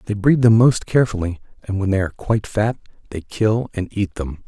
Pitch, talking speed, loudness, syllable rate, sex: 105 Hz, 215 wpm, -19 LUFS, 5.8 syllables/s, male